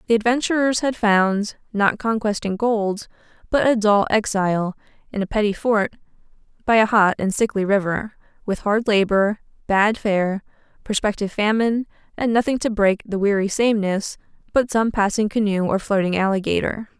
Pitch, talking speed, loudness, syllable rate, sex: 210 Hz, 150 wpm, -20 LUFS, 5.0 syllables/s, female